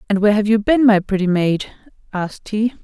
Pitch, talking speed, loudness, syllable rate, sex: 205 Hz, 210 wpm, -17 LUFS, 5.9 syllables/s, female